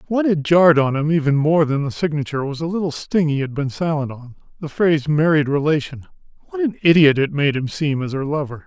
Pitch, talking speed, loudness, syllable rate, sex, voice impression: 155 Hz, 215 wpm, -18 LUFS, 6.0 syllables/s, male, masculine, middle-aged, slightly relaxed, slightly soft, fluent, slightly calm, friendly, unique